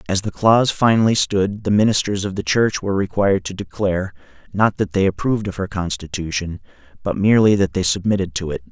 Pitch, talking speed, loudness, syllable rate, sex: 100 Hz, 195 wpm, -19 LUFS, 6.1 syllables/s, male